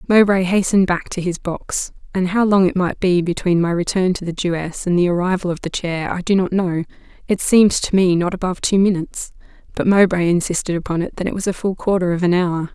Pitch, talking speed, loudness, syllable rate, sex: 180 Hz, 235 wpm, -18 LUFS, 5.9 syllables/s, female